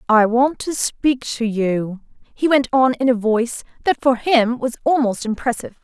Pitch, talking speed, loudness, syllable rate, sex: 245 Hz, 185 wpm, -18 LUFS, 4.8 syllables/s, female